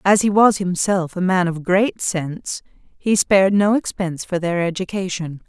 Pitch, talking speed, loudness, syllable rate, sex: 185 Hz, 175 wpm, -19 LUFS, 4.6 syllables/s, female